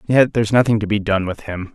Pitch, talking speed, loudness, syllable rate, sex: 105 Hz, 275 wpm, -18 LUFS, 6.2 syllables/s, male